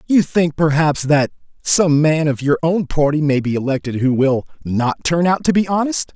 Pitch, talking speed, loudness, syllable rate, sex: 155 Hz, 205 wpm, -17 LUFS, 4.8 syllables/s, male